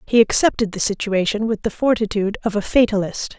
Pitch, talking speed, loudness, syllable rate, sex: 210 Hz, 175 wpm, -19 LUFS, 5.9 syllables/s, female